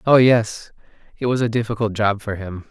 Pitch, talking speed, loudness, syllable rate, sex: 110 Hz, 200 wpm, -19 LUFS, 5.2 syllables/s, male